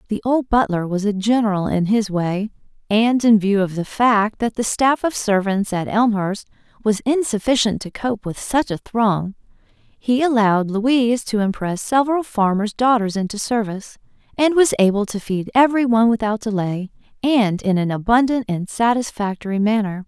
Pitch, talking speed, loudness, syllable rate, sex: 220 Hz, 165 wpm, -19 LUFS, 4.9 syllables/s, female